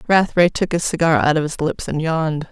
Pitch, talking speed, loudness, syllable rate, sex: 160 Hz, 240 wpm, -18 LUFS, 5.9 syllables/s, female